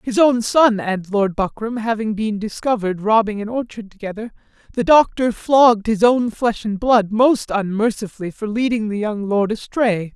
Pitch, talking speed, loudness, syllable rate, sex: 220 Hz, 170 wpm, -18 LUFS, 4.8 syllables/s, male